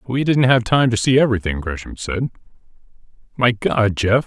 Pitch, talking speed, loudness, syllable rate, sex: 115 Hz, 170 wpm, -18 LUFS, 5.1 syllables/s, male